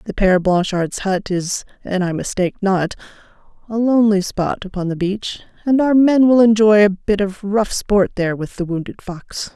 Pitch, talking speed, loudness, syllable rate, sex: 200 Hz, 175 wpm, -17 LUFS, 4.9 syllables/s, female